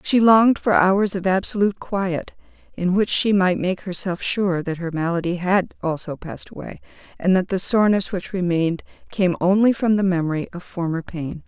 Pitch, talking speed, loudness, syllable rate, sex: 185 Hz, 185 wpm, -20 LUFS, 5.2 syllables/s, female